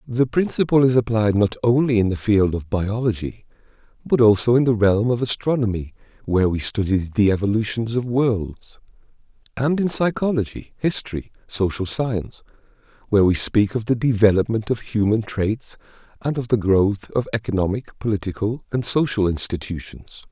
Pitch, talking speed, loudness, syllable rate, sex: 110 Hz, 150 wpm, -20 LUFS, 5.1 syllables/s, male